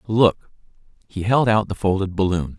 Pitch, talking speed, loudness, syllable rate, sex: 100 Hz, 160 wpm, -20 LUFS, 5.1 syllables/s, male